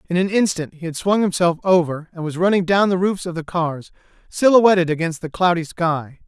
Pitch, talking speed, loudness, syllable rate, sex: 175 Hz, 210 wpm, -19 LUFS, 5.4 syllables/s, male